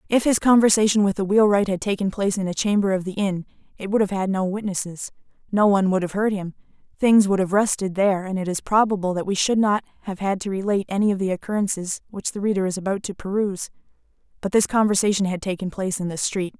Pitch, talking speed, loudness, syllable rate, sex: 195 Hz, 230 wpm, -22 LUFS, 6.6 syllables/s, female